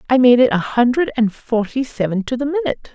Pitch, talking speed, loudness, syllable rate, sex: 245 Hz, 225 wpm, -17 LUFS, 6.0 syllables/s, female